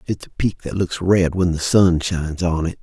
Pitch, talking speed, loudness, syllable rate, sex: 85 Hz, 255 wpm, -19 LUFS, 4.9 syllables/s, male